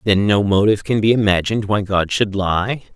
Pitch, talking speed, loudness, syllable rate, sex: 100 Hz, 205 wpm, -17 LUFS, 5.5 syllables/s, male